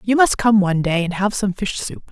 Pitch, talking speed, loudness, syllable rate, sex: 200 Hz, 285 wpm, -18 LUFS, 5.6 syllables/s, female